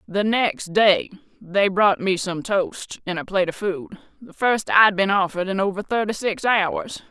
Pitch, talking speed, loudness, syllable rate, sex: 195 Hz, 205 wpm, -21 LUFS, 4.6 syllables/s, female